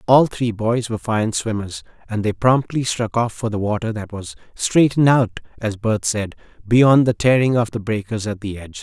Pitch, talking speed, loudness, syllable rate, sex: 110 Hz, 205 wpm, -19 LUFS, 5.1 syllables/s, male